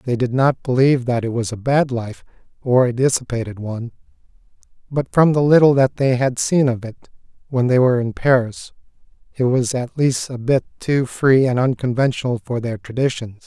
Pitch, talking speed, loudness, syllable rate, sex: 125 Hz, 185 wpm, -18 LUFS, 5.3 syllables/s, male